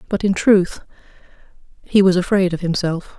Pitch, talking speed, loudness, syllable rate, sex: 185 Hz, 150 wpm, -17 LUFS, 4.9 syllables/s, female